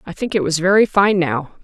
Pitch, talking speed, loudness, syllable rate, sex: 185 Hz, 255 wpm, -16 LUFS, 5.4 syllables/s, female